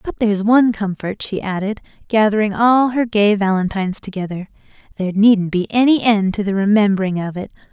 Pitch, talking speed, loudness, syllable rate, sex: 205 Hz, 170 wpm, -17 LUFS, 5.7 syllables/s, female